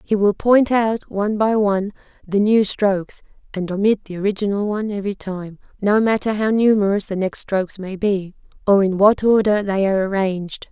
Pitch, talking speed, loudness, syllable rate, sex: 200 Hz, 185 wpm, -19 LUFS, 5.4 syllables/s, female